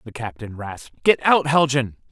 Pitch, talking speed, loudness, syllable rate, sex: 130 Hz, 170 wpm, -19 LUFS, 4.8 syllables/s, male